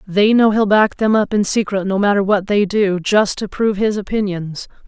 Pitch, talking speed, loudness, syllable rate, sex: 205 Hz, 220 wpm, -16 LUFS, 5.1 syllables/s, female